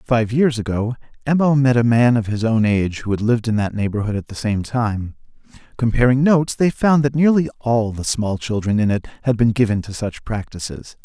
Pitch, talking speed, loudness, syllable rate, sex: 115 Hz, 215 wpm, -19 LUFS, 5.5 syllables/s, male